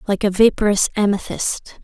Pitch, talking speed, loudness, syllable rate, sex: 205 Hz, 130 wpm, -18 LUFS, 5.0 syllables/s, female